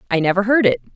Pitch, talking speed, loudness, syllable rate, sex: 200 Hz, 250 wpm, -17 LUFS, 8.1 syllables/s, female